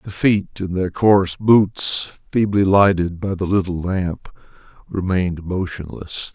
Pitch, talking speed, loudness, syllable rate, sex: 95 Hz, 130 wpm, -19 LUFS, 4.1 syllables/s, male